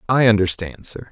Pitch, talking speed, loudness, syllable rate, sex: 105 Hz, 160 wpm, -19 LUFS, 5.3 syllables/s, male